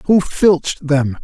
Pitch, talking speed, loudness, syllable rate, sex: 160 Hz, 145 wpm, -15 LUFS, 3.4 syllables/s, male